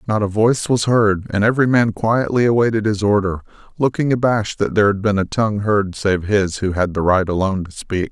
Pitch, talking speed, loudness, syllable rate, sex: 105 Hz, 220 wpm, -17 LUFS, 5.8 syllables/s, male